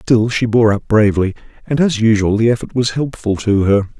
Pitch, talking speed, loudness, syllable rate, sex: 115 Hz, 210 wpm, -15 LUFS, 5.5 syllables/s, male